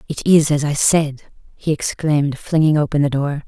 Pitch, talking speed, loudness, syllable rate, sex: 150 Hz, 190 wpm, -17 LUFS, 5.0 syllables/s, female